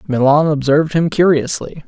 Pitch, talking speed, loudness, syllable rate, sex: 150 Hz, 130 wpm, -14 LUFS, 5.3 syllables/s, male